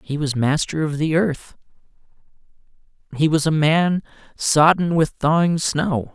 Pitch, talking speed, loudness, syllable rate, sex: 155 Hz, 135 wpm, -19 LUFS, 4.1 syllables/s, male